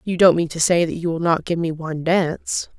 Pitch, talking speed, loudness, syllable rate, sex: 170 Hz, 280 wpm, -20 LUFS, 5.7 syllables/s, female